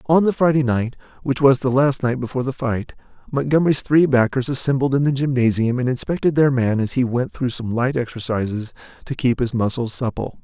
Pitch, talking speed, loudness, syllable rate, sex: 130 Hz, 200 wpm, -20 LUFS, 5.7 syllables/s, male